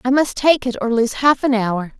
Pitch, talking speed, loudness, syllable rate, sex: 245 Hz, 270 wpm, -17 LUFS, 4.8 syllables/s, female